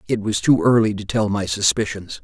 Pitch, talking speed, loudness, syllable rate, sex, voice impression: 105 Hz, 215 wpm, -19 LUFS, 5.3 syllables/s, male, very masculine, very adult-like, middle-aged, very thick, tensed, slightly powerful, slightly weak, slightly dark, slightly soft, muffled, fluent, slightly raspy, intellectual, slightly refreshing, sincere, slightly calm, mature, reassuring, slightly unique, elegant, slightly wild, sweet, lively